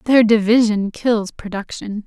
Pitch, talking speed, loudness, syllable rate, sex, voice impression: 215 Hz, 115 wpm, -17 LUFS, 4.2 syllables/s, female, feminine, adult-like, tensed, slightly weak, soft, clear, intellectual, calm, friendly, reassuring, elegant, kind, slightly modest